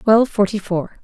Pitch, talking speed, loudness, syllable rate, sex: 205 Hz, 175 wpm, -18 LUFS, 5.3 syllables/s, female